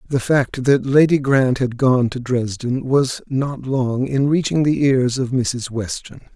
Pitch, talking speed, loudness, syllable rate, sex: 130 Hz, 180 wpm, -18 LUFS, 3.9 syllables/s, male